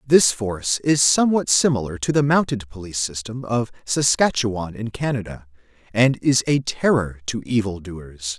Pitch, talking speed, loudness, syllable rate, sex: 115 Hz, 150 wpm, -20 LUFS, 4.8 syllables/s, male